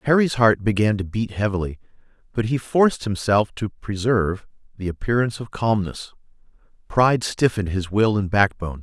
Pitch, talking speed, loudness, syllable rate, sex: 105 Hz, 150 wpm, -21 LUFS, 5.6 syllables/s, male